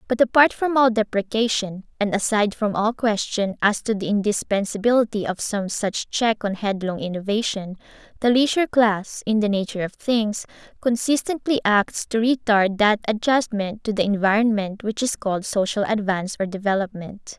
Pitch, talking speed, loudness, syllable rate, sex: 210 Hz, 155 wpm, -21 LUFS, 5.1 syllables/s, female